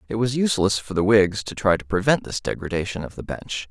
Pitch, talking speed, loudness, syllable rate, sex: 105 Hz, 245 wpm, -22 LUFS, 6.0 syllables/s, male